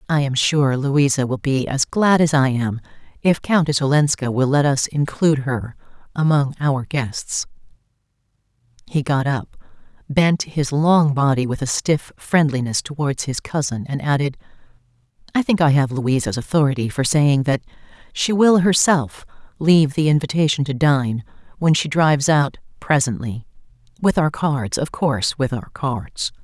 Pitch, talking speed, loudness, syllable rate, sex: 140 Hz, 150 wpm, -19 LUFS, 4.6 syllables/s, female